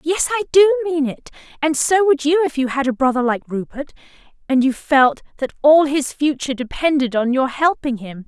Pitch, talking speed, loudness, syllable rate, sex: 285 Hz, 205 wpm, -17 LUFS, 5.3 syllables/s, female